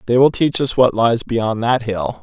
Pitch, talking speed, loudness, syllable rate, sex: 120 Hz, 245 wpm, -16 LUFS, 4.4 syllables/s, male